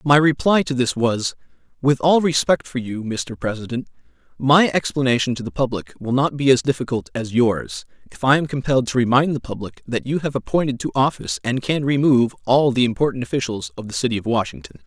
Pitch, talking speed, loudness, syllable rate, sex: 135 Hz, 200 wpm, -20 LUFS, 5.8 syllables/s, male